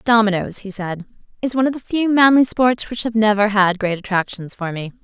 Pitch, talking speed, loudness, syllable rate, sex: 215 Hz, 215 wpm, -18 LUFS, 5.6 syllables/s, female